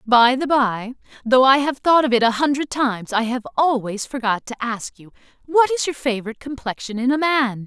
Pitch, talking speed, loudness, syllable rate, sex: 250 Hz, 210 wpm, -19 LUFS, 5.4 syllables/s, female